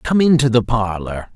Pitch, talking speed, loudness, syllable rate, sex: 120 Hz, 175 wpm, -16 LUFS, 4.7 syllables/s, male